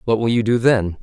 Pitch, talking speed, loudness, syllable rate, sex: 110 Hz, 290 wpm, -17 LUFS, 5.7 syllables/s, male